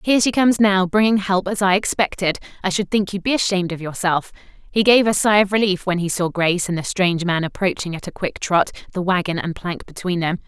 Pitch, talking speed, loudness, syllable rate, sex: 190 Hz, 240 wpm, -19 LUFS, 6.0 syllables/s, female